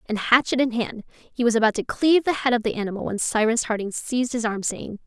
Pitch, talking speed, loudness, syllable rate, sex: 230 Hz, 250 wpm, -22 LUFS, 6.0 syllables/s, female